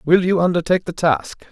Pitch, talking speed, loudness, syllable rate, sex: 165 Hz, 200 wpm, -18 LUFS, 6.2 syllables/s, male